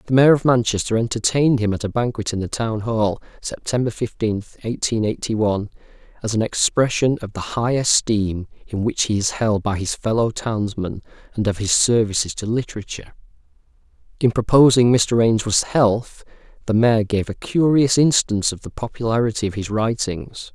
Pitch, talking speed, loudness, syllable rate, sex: 110 Hz, 165 wpm, -19 LUFS, 5.2 syllables/s, male